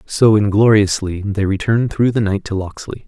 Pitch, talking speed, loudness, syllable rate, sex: 105 Hz, 175 wpm, -16 LUFS, 5.1 syllables/s, male